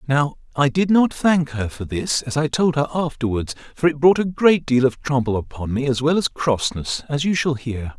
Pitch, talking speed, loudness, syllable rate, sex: 140 Hz, 235 wpm, -20 LUFS, 2.5 syllables/s, male